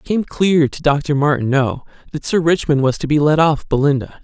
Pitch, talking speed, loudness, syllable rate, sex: 150 Hz, 210 wpm, -16 LUFS, 5.6 syllables/s, male